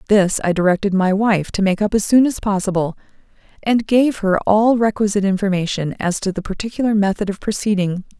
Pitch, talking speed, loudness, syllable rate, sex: 200 Hz, 185 wpm, -18 LUFS, 5.8 syllables/s, female